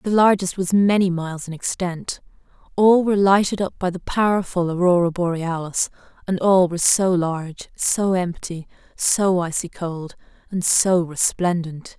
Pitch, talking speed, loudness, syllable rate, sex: 180 Hz, 145 wpm, -20 LUFS, 4.6 syllables/s, female